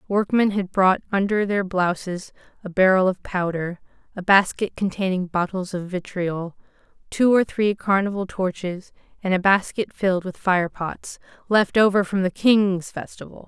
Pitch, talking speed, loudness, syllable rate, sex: 190 Hz, 150 wpm, -21 LUFS, 4.5 syllables/s, female